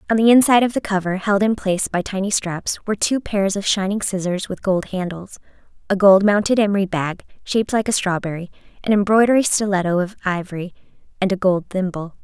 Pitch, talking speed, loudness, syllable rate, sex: 195 Hz, 190 wpm, -19 LUFS, 6.0 syllables/s, female